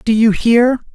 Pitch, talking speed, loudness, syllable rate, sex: 230 Hz, 190 wpm, -13 LUFS, 4.2 syllables/s, female